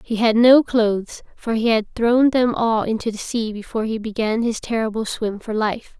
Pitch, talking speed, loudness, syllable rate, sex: 225 Hz, 210 wpm, -19 LUFS, 4.9 syllables/s, female